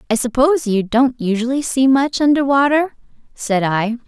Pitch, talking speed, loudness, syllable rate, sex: 255 Hz, 160 wpm, -16 LUFS, 5.0 syllables/s, female